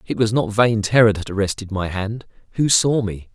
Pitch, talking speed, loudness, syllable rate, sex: 105 Hz, 215 wpm, -19 LUFS, 5.2 syllables/s, male